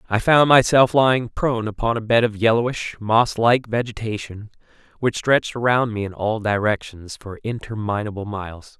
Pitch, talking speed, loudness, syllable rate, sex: 110 Hz, 150 wpm, -20 LUFS, 5.2 syllables/s, male